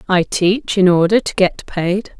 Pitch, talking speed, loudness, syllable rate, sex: 190 Hz, 190 wpm, -15 LUFS, 4.0 syllables/s, female